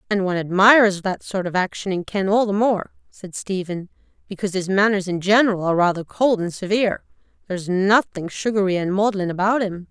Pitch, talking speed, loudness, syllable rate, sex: 195 Hz, 190 wpm, -20 LUFS, 5.8 syllables/s, female